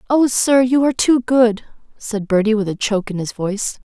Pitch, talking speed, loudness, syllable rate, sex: 225 Hz, 215 wpm, -17 LUFS, 5.5 syllables/s, female